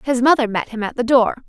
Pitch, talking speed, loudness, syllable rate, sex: 245 Hz, 285 wpm, -17 LUFS, 5.8 syllables/s, female